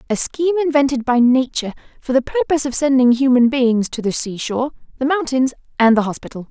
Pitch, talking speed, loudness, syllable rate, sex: 260 Hz, 185 wpm, -17 LUFS, 6.2 syllables/s, female